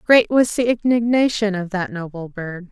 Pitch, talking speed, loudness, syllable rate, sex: 215 Hz, 175 wpm, -19 LUFS, 4.7 syllables/s, female